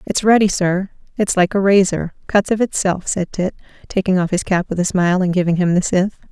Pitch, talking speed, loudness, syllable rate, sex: 185 Hz, 230 wpm, -17 LUFS, 5.8 syllables/s, female